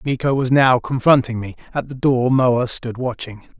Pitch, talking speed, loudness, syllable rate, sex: 125 Hz, 185 wpm, -18 LUFS, 4.6 syllables/s, male